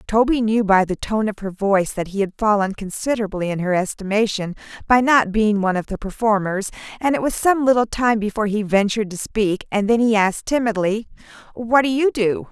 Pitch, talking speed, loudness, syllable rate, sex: 215 Hz, 205 wpm, -19 LUFS, 5.7 syllables/s, female